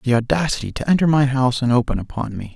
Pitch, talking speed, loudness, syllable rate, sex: 130 Hz, 235 wpm, -19 LUFS, 7.0 syllables/s, male